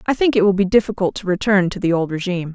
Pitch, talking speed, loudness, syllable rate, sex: 195 Hz, 285 wpm, -18 LUFS, 7.1 syllables/s, female